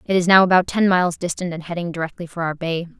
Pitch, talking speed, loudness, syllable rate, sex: 175 Hz, 260 wpm, -19 LUFS, 6.8 syllables/s, female